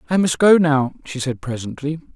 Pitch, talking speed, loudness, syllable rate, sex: 150 Hz, 195 wpm, -19 LUFS, 5.3 syllables/s, male